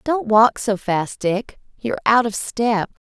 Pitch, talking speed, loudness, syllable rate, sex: 220 Hz, 175 wpm, -19 LUFS, 3.9 syllables/s, female